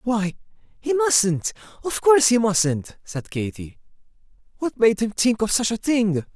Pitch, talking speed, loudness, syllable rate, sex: 185 Hz, 150 wpm, -21 LUFS, 4.1 syllables/s, male